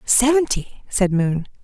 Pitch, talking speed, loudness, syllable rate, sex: 215 Hz, 110 wpm, -19 LUFS, 3.6 syllables/s, female